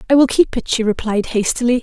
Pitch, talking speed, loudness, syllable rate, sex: 240 Hz, 230 wpm, -16 LUFS, 6.1 syllables/s, female